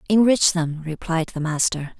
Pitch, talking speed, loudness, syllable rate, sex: 170 Hz, 150 wpm, -21 LUFS, 4.5 syllables/s, female